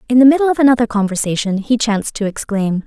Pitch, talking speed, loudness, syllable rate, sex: 230 Hz, 210 wpm, -15 LUFS, 6.7 syllables/s, female